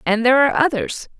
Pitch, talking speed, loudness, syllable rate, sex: 255 Hz, 200 wpm, -16 LUFS, 7.0 syllables/s, female